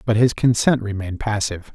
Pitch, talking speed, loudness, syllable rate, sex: 110 Hz, 170 wpm, -20 LUFS, 6.2 syllables/s, male